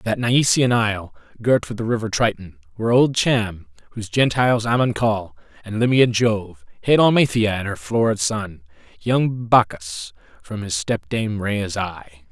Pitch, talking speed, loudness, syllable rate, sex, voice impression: 110 Hz, 150 wpm, -20 LUFS, 4.5 syllables/s, male, masculine, adult-like, slightly middle-aged, slightly thick, slightly tensed, slightly powerful, bright, very hard, slightly muffled, very fluent, slightly raspy, slightly cool, intellectual, slightly refreshing, sincere, very calm, very mature, friendly, reassuring, unique, wild, slightly sweet, slightly lively, slightly strict, slightly sharp